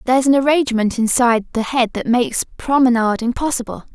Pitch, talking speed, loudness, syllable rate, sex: 245 Hz, 165 wpm, -17 LUFS, 6.5 syllables/s, female